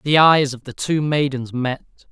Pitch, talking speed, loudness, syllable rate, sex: 140 Hz, 200 wpm, -19 LUFS, 4.5 syllables/s, male